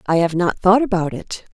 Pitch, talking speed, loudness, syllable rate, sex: 185 Hz, 235 wpm, -17 LUFS, 5.2 syllables/s, female